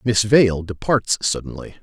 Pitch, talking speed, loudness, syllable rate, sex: 100 Hz, 130 wpm, -18 LUFS, 4.3 syllables/s, male